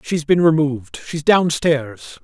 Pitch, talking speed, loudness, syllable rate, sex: 145 Hz, 135 wpm, -17 LUFS, 3.9 syllables/s, male